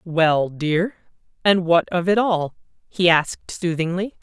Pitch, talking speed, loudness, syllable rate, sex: 175 Hz, 140 wpm, -20 LUFS, 3.8 syllables/s, female